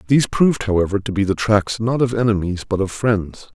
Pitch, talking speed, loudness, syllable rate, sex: 105 Hz, 220 wpm, -19 LUFS, 5.7 syllables/s, male